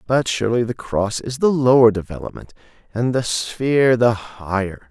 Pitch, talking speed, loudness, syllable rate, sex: 115 Hz, 160 wpm, -18 LUFS, 4.9 syllables/s, male